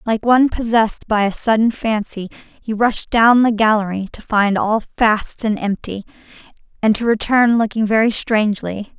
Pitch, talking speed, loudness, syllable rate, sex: 220 Hz, 160 wpm, -16 LUFS, 4.7 syllables/s, female